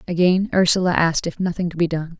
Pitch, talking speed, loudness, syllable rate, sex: 175 Hz, 220 wpm, -19 LUFS, 6.5 syllables/s, female